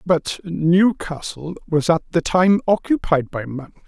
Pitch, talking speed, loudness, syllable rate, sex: 170 Hz, 140 wpm, -19 LUFS, 3.7 syllables/s, male